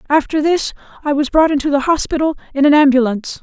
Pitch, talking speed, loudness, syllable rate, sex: 290 Hz, 195 wpm, -15 LUFS, 6.5 syllables/s, female